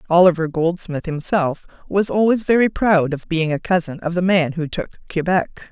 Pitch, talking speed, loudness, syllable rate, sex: 175 Hz, 180 wpm, -19 LUFS, 5.0 syllables/s, female